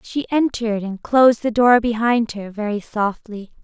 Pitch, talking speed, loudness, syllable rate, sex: 225 Hz, 165 wpm, -18 LUFS, 4.8 syllables/s, female